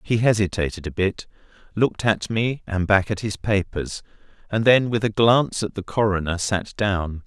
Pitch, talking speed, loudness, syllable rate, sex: 100 Hz, 180 wpm, -22 LUFS, 4.8 syllables/s, male